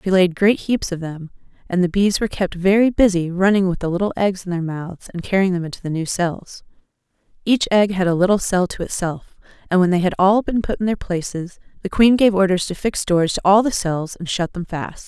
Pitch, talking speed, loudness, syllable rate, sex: 185 Hz, 245 wpm, -19 LUFS, 5.6 syllables/s, female